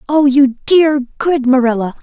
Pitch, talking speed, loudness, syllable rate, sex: 270 Hz, 150 wpm, -13 LUFS, 4.4 syllables/s, female